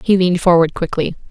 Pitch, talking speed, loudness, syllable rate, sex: 175 Hz, 185 wpm, -15 LUFS, 6.5 syllables/s, female